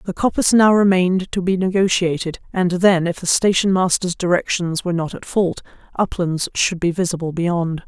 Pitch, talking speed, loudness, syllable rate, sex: 180 Hz, 175 wpm, -18 LUFS, 5.3 syllables/s, female